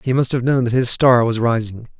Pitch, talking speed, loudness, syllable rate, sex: 120 Hz, 270 wpm, -16 LUFS, 5.5 syllables/s, male